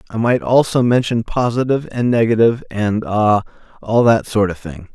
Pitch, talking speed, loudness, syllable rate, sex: 115 Hz, 145 wpm, -16 LUFS, 5.2 syllables/s, male